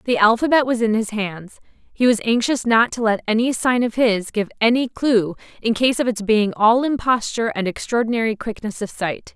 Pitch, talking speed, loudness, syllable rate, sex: 225 Hz, 200 wpm, -19 LUFS, 5.2 syllables/s, female